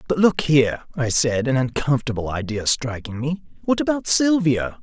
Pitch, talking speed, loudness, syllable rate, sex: 140 Hz, 160 wpm, -21 LUFS, 5.1 syllables/s, male